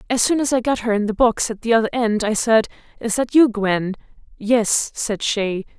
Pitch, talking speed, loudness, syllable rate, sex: 225 Hz, 230 wpm, -19 LUFS, 5.0 syllables/s, female